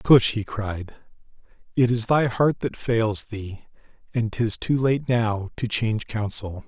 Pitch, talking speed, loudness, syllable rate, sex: 115 Hz, 160 wpm, -24 LUFS, 3.9 syllables/s, male